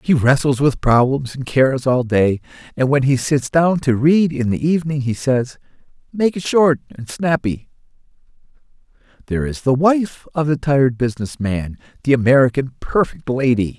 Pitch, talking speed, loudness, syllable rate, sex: 135 Hz, 165 wpm, -17 LUFS, 4.9 syllables/s, male